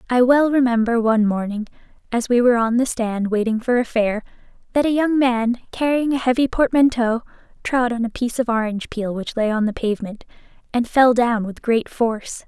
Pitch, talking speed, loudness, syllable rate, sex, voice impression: 235 Hz, 195 wpm, -19 LUFS, 5.5 syllables/s, female, feminine, slightly young, bright, clear, fluent, cute, calm, friendly, slightly sweet, kind